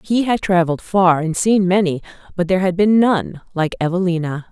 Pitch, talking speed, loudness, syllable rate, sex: 180 Hz, 185 wpm, -17 LUFS, 5.4 syllables/s, female